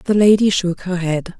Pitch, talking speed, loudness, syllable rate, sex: 185 Hz, 215 wpm, -16 LUFS, 4.6 syllables/s, female